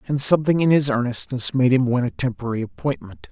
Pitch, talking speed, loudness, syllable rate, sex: 130 Hz, 200 wpm, -20 LUFS, 6.4 syllables/s, male